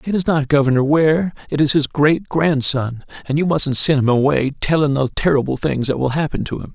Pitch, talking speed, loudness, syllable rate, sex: 145 Hz, 220 wpm, -17 LUFS, 5.3 syllables/s, male